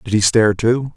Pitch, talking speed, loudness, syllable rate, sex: 110 Hz, 250 wpm, -15 LUFS, 5.5 syllables/s, male